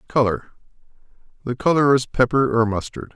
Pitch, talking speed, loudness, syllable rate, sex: 120 Hz, 115 wpm, -20 LUFS, 5.4 syllables/s, male